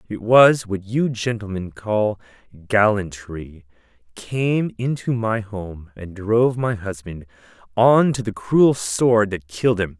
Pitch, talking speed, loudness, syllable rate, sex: 105 Hz, 140 wpm, -20 LUFS, 3.7 syllables/s, male